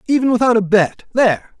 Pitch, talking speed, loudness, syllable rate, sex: 215 Hz, 190 wpm, -15 LUFS, 5.8 syllables/s, male